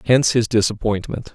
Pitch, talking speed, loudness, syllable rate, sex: 110 Hz, 135 wpm, -18 LUFS, 6.0 syllables/s, male